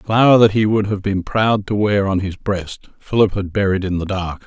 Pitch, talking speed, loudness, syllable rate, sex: 100 Hz, 255 wpm, -17 LUFS, 5.1 syllables/s, male